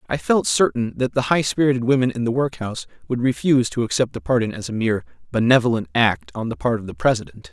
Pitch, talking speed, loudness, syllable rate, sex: 125 Hz, 225 wpm, -20 LUFS, 6.5 syllables/s, male